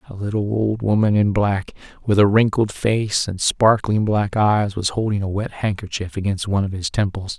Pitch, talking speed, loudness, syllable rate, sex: 100 Hz, 195 wpm, -20 LUFS, 4.9 syllables/s, male